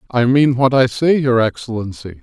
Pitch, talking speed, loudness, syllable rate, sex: 125 Hz, 190 wpm, -15 LUFS, 5.2 syllables/s, male